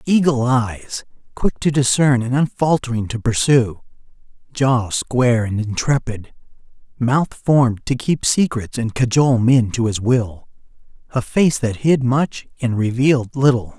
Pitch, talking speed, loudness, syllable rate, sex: 125 Hz, 135 wpm, -18 LUFS, 4.3 syllables/s, male